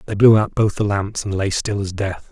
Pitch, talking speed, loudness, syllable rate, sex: 100 Hz, 285 wpm, -19 LUFS, 5.2 syllables/s, male